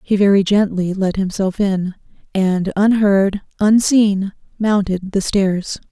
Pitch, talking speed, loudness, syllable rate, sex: 195 Hz, 120 wpm, -16 LUFS, 3.7 syllables/s, female